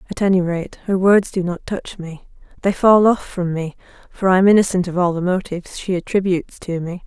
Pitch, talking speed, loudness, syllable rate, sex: 185 Hz, 220 wpm, -18 LUFS, 5.6 syllables/s, female